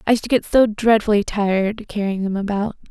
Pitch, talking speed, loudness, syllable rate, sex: 210 Hz, 205 wpm, -19 LUFS, 5.6 syllables/s, female